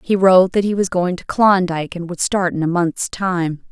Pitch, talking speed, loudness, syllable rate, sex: 180 Hz, 240 wpm, -17 LUFS, 5.1 syllables/s, female